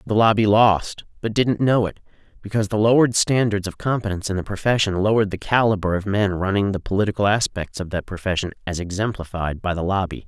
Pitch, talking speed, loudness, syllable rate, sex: 100 Hz, 185 wpm, -21 LUFS, 6.3 syllables/s, male